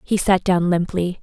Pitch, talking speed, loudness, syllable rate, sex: 180 Hz, 195 wpm, -19 LUFS, 4.4 syllables/s, female